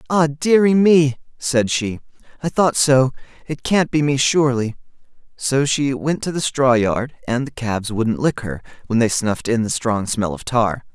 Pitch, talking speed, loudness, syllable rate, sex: 130 Hz, 190 wpm, -18 LUFS, 4.6 syllables/s, male